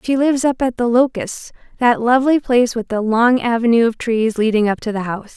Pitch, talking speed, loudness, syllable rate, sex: 235 Hz, 225 wpm, -16 LUFS, 5.8 syllables/s, female